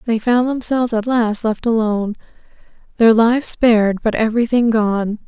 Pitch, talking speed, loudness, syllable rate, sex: 225 Hz, 150 wpm, -16 LUFS, 5.2 syllables/s, female